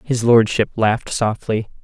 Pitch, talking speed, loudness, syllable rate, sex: 110 Hz, 130 wpm, -17 LUFS, 4.5 syllables/s, male